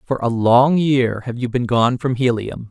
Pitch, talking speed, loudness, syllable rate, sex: 125 Hz, 220 wpm, -17 LUFS, 4.3 syllables/s, male